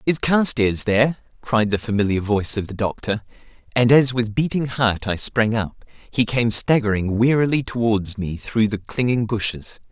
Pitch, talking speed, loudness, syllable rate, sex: 115 Hz, 170 wpm, -20 LUFS, 4.8 syllables/s, male